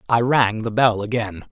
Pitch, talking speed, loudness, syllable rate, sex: 115 Hz, 200 wpm, -19 LUFS, 4.6 syllables/s, male